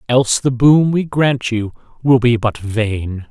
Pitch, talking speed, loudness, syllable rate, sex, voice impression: 120 Hz, 180 wpm, -15 LUFS, 3.9 syllables/s, male, masculine, adult-like, bright, clear, fluent, intellectual, slightly refreshing, sincere, friendly, slightly unique, kind, light